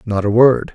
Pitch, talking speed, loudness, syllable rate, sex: 115 Hz, 240 wpm, -13 LUFS, 4.6 syllables/s, male